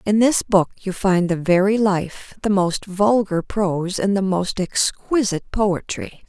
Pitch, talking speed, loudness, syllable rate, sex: 195 Hz, 160 wpm, -20 LUFS, 4.0 syllables/s, female